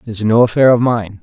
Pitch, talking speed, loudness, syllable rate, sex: 115 Hz, 295 wpm, -12 LUFS, 5.9 syllables/s, male